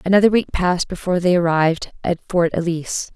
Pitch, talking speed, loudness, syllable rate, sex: 175 Hz, 170 wpm, -19 LUFS, 6.5 syllables/s, female